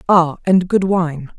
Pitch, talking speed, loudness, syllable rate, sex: 175 Hz, 175 wpm, -16 LUFS, 3.6 syllables/s, female